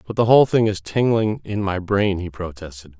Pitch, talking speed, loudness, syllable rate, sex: 100 Hz, 220 wpm, -19 LUFS, 5.4 syllables/s, male